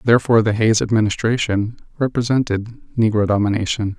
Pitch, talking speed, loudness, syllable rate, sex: 110 Hz, 105 wpm, -18 LUFS, 6.2 syllables/s, male